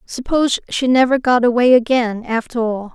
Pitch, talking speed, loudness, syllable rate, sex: 245 Hz, 165 wpm, -16 LUFS, 5.1 syllables/s, female